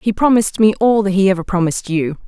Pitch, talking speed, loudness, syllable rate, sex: 195 Hz, 235 wpm, -15 LUFS, 6.4 syllables/s, female